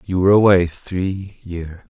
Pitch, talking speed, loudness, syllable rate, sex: 90 Hz, 155 wpm, -16 LUFS, 4.0 syllables/s, male